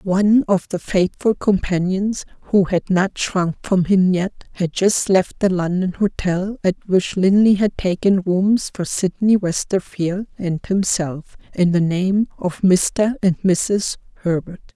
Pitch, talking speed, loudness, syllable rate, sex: 190 Hz, 145 wpm, -18 LUFS, 3.8 syllables/s, female